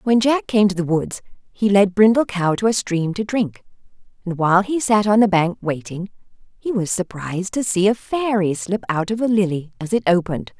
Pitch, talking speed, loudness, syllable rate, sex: 195 Hz, 215 wpm, -19 LUFS, 5.2 syllables/s, female